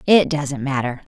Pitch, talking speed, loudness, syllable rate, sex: 145 Hz, 155 wpm, -20 LUFS, 4.2 syllables/s, female